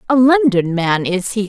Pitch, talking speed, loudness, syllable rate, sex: 215 Hz, 205 wpm, -15 LUFS, 4.5 syllables/s, female